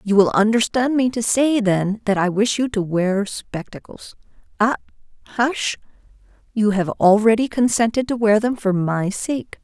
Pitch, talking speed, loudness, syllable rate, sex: 215 Hz, 150 wpm, -19 LUFS, 4.5 syllables/s, female